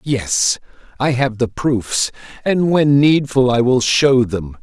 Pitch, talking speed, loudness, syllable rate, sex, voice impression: 125 Hz, 155 wpm, -16 LUFS, 3.5 syllables/s, male, very masculine, old, thick, relaxed, slightly powerful, bright, soft, slightly clear, fluent, slightly raspy, cool, intellectual, sincere, very calm, very mature, friendly, reassuring, slightly unique, slightly elegant, slightly wild, sweet, lively, kind, slightly modest